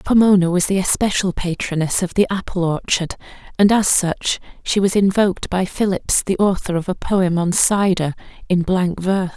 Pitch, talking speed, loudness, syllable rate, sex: 185 Hz, 175 wpm, -18 LUFS, 5.0 syllables/s, female